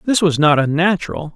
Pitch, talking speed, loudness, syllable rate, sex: 165 Hz, 175 wpm, -15 LUFS, 5.8 syllables/s, male